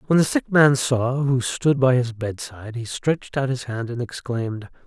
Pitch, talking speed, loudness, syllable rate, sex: 125 Hz, 210 wpm, -22 LUFS, 4.8 syllables/s, male